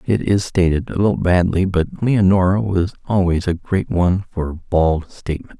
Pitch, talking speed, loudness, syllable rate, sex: 90 Hz, 170 wpm, -18 LUFS, 4.8 syllables/s, male